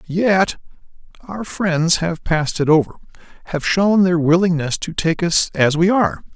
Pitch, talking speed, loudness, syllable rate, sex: 170 Hz, 150 wpm, -17 LUFS, 4.5 syllables/s, male